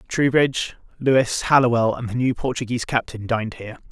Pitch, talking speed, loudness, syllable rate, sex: 120 Hz, 155 wpm, -21 LUFS, 5.9 syllables/s, male